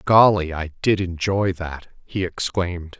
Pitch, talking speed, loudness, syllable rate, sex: 90 Hz, 140 wpm, -21 LUFS, 4.0 syllables/s, male